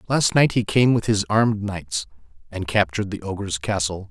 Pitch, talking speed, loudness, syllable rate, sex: 100 Hz, 190 wpm, -21 LUFS, 5.2 syllables/s, male